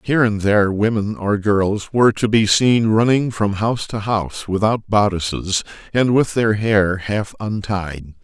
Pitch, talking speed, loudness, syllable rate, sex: 105 Hz, 170 wpm, -18 LUFS, 4.4 syllables/s, male